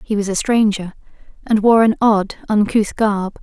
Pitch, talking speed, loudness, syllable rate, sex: 210 Hz, 175 wpm, -16 LUFS, 4.4 syllables/s, female